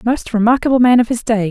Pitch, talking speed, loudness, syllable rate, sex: 235 Hz, 240 wpm, -14 LUFS, 6.4 syllables/s, female